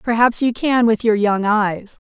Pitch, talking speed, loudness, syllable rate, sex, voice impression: 220 Hz, 205 wpm, -17 LUFS, 4.3 syllables/s, female, feminine, adult-like, tensed, powerful, bright, clear, friendly, lively, intense, sharp